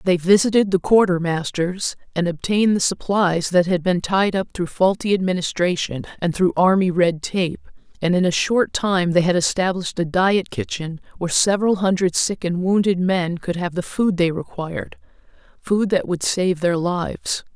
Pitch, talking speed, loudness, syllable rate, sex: 180 Hz, 175 wpm, -20 LUFS, 4.9 syllables/s, female